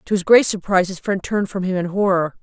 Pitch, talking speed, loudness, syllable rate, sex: 190 Hz, 270 wpm, -18 LUFS, 6.5 syllables/s, female